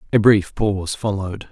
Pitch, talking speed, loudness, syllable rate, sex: 100 Hz, 160 wpm, -19 LUFS, 5.6 syllables/s, male